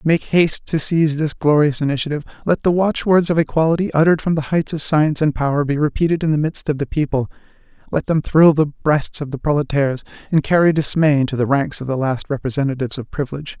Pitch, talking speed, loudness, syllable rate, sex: 150 Hz, 210 wpm, -18 LUFS, 6.5 syllables/s, male